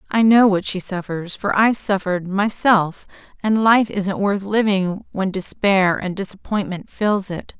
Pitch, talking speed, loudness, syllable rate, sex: 195 Hz, 160 wpm, -19 LUFS, 4.2 syllables/s, female